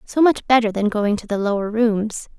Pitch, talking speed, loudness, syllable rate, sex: 220 Hz, 225 wpm, -19 LUFS, 5.0 syllables/s, female